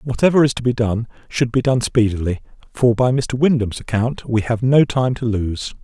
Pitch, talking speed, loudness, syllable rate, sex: 120 Hz, 205 wpm, -18 LUFS, 5.0 syllables/s, male